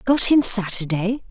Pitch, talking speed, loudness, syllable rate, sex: 220 Hz, 140 wpm, -18 LUFS, 4.3 syllables/s, female